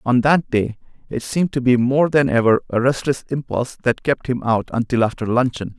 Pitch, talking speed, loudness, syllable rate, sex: 125 Hz, 205 wpm, -19 LUFS, 5.6 syllables/s, male